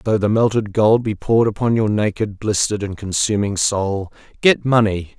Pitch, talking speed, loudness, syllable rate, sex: 105 Hz, 160 wpm, -18 LUFS, 5.1 syllables/s, male